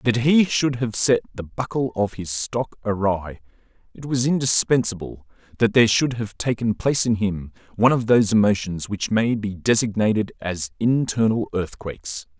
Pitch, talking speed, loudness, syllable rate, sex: 110 Hz, 160 wpm, -21 LUFS, 5.0 syllables/s, male